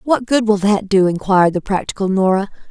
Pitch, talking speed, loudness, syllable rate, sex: 200 Hz, 200 wpm, -16 LUFS, 5.8 syllables/s, female